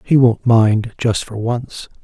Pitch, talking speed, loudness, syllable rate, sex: 115 Hz, 175 wpm, -16 LUFS, 3.4 syllables/s, male